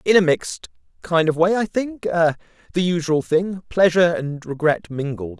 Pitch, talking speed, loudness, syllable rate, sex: 165 Hz, 165 wpm, -20 LUFS, 4.6 syllables/s, male